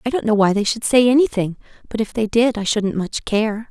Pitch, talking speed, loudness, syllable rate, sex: 220 Hz, 260 wpm, -18 LUFS, 5.5 syllables/s, female